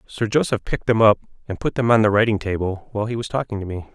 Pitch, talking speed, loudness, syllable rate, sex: 110 Hz, 275 wpm, -20 LUFS, 7.0 syllables/s, male